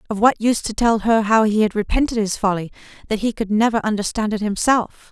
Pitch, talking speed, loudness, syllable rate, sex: 215 Hz, 225 wpm, -19 LUFS, 6.1 syllables/s, female